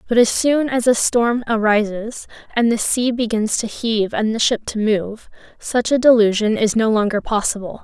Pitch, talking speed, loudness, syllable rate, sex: 225 Hz, 190 wpm, -17 LUFS, 4.8 syllables/s, female